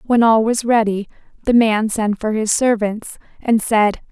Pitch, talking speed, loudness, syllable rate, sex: 220 Hz, 175 wpm, -17 LUFS, 4.2 syllables/s, female